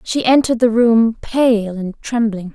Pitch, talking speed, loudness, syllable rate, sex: 230 Hz, 140 wpm, -15 LUFS, 4.1 syllables/s, female